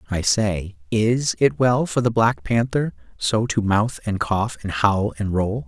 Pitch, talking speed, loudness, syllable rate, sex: 110 Hz, 190 wpm, -21 LUFS, 3.9 syllables/s, male